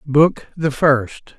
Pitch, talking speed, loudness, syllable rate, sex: 145 Hz, 130 wpm, -17 LUFS, 2.5 syllables/s, male